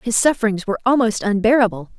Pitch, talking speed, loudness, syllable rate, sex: 220 Hz, 150 wpm, -17 LUFS, 6.8 syllables/s, female